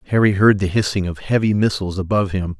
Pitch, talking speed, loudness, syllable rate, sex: 95 Hz, 210 wpm, -18 LUFS, 6.8 syllables/s, male